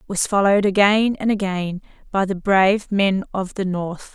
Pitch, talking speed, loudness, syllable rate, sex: 195 Hz, 190 wpm, -19 LUFS, 4.8 syllables/s, female